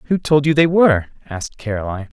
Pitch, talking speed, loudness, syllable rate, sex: 135 Hz, 190 wpm, -16 LUFS, 7.0 syllables/s, male